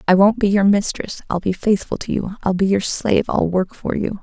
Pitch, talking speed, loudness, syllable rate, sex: 195 Hz, 255 wpm, -19 LUFS, 5.3 syllables/s, female